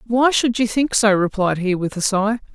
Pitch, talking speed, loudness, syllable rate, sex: 215 Hz, 235 wpm, -18 LUFS, 4.8 syllables/s, female